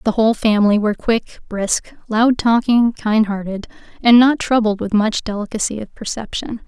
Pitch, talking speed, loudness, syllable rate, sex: 220 Hz, 160 wpm, -17 LUFS, 5.2 syllables/s, female